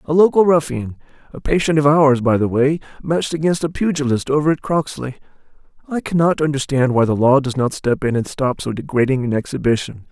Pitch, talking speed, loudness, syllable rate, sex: 140 Hz, 195 wpm, -17 LUFS, 5.8 syllables/s, male